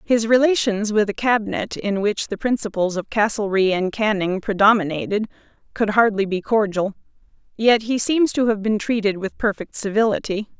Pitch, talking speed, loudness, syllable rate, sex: 210 Hz, 160 wpm, -20 LUFS, 5.1 syllables/s, female